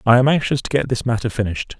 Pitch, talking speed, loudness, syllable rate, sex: 120 Hz, 265 wpm, -19 LUFS, 7.2 syllables/s, male